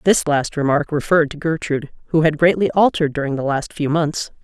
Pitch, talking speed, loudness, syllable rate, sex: 155 Hz, 205 wpm, -18 LUFS, 5.9 syllables/s, female